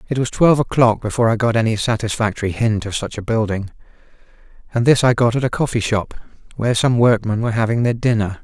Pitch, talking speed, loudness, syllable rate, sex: 115 Hz, 205 wpm, -18 LUFS, 6.6 syllables/s, male